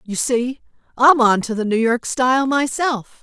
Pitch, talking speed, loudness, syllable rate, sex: 245 Hz, 165 wpm, -17 LUFS, 4.3 syllables/s, female